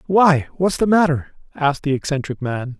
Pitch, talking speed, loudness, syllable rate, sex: 150 Hz, 170 wpm, -19 LUFS, 5.2 syllables/s, male